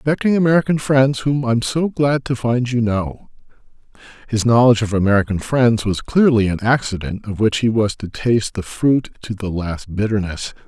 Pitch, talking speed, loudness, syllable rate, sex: 115 Hz, 180 wpm, -18 LUFS, 5.1 syllables/s, male